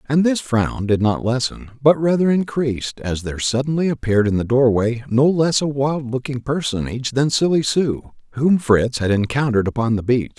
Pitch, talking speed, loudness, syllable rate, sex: 130 Hz, 185 wpm, -19 LUFS, 5.3 syllables/s, male